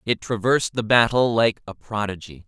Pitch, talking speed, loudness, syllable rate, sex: 110 Hz, 170 wpm, -21 LUFS, 5.3 syllables/s, male